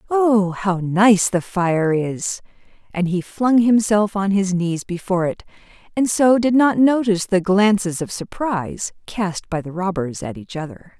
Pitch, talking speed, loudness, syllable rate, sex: 195 Hz, 170 wpm, -19 LUFS, 4.3 syllables/s, female